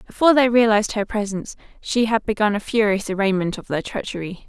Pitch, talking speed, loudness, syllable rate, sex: 210 Hz, 190 wpm, -20 LUFS, 6.4 syllables/s, female